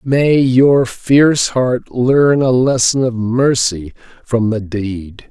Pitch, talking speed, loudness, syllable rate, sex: 125 Hz, 135 wpm, -14 LUFS, 3.1 syllables/s, male